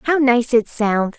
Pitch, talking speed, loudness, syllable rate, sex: 240 Hz, 205 wpm, -17 LUFS, 3.5 syllables/s, female